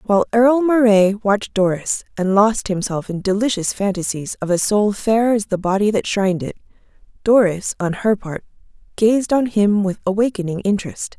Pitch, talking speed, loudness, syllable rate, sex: 205 Hz, 165 wpm, -18 LUFS, 5.1 syllables/s, female